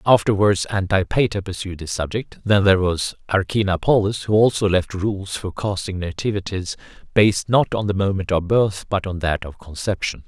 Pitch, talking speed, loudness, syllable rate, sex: 95 Hz, 165 wpm, -20 LUFS, 5.1 syllables/s, male